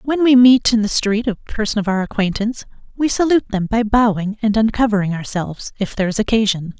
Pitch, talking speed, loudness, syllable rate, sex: 215 Hz, 205 wpm, -17 LUFS, 6.0 syllables/s, female